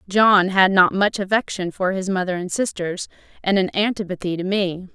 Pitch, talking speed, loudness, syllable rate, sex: 190 Hz, 180 wpm, -20 LUFS, 5.1 syllables/s, female